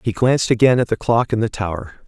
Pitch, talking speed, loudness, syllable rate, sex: 110 Hz, 260 wpm, -18 LUFS, 6.4 syllables/s, male